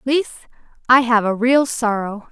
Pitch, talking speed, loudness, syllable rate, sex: 235 Hz, 155 wpm, -17 LUFS, 4.7 syllables/s, female